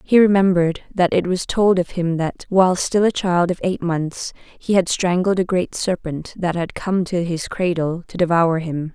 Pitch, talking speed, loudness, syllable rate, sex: 175 Hz, 210 wpm, -19 LUFS, 4.6 syllables/s, female